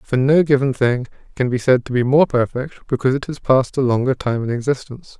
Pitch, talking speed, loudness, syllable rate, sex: 130 Hz, 230 wpm, -18 LUFS, 6.0 syllables/s, male